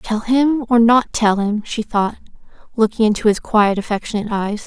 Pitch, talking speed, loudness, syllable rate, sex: 220 Hz, 180 wpm, -17 LUFS, 5.0 syllables/s, female